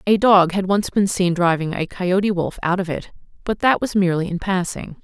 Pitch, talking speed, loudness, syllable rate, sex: 185 Hz, 225 wpm, -19 LUFS, 5.3 syllables/s, female